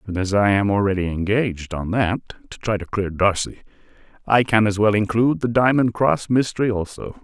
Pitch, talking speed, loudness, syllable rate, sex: 105 Hz, 190 wpm, -20 LUFS, 5.6 syllables/s, male